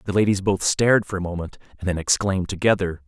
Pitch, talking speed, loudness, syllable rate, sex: 95 Hz, 215 wpm, -22 LUFS, 6.6 syllables/s, male